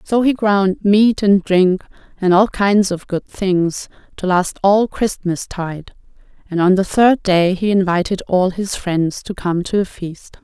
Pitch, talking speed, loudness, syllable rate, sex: 190 Hz, 185 wpm, -16 LUFS, 3.9 syllables/s, female